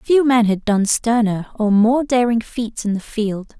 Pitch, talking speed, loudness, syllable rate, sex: 225 Hz, 200 wpm, -18 LUFS, 4.0 syllables/s, female